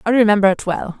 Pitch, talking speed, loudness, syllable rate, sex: 205 Hz, 240 wpm, -16 LUFS, 6.9 syllables/s, female